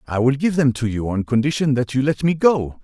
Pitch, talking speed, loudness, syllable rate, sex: 130 Hz, 275 wpm, -19 LUFS, 5.6 syllables/s, male